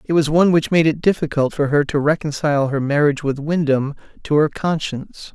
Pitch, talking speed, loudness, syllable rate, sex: 150 Hz, 200 wpm, -18 LUFS, 5.8 syllables/s, male